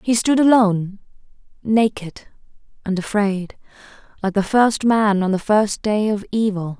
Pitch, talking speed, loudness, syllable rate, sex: 205 Hz, 140 wpm, -18 LUFS, 4.4 syllables/s, female